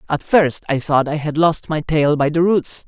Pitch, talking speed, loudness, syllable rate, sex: 155 Hz, 250 wpm, -17 LUFS, 4.5 syllables/s, male